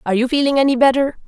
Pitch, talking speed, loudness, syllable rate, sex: 260 Hz, 235 wpm, -15 LUFS, 8.3 syllables/s, female